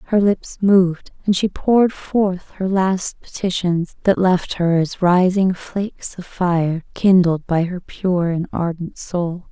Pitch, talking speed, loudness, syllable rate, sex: 180 Hz, 160 wpm, -18 LUFS, 3.8 syllables/s, female